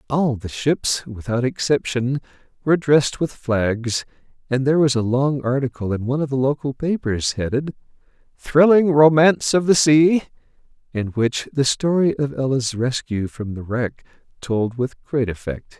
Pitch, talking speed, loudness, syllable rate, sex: 130 Hz, 155 wpm, -20 LUFS, 4.6 syllables/s, male